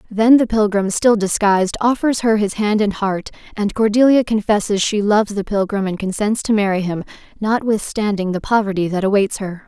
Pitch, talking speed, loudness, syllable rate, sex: 205 Hz, 180 wpm, -17 LUFS, 5.3 syllables/s, female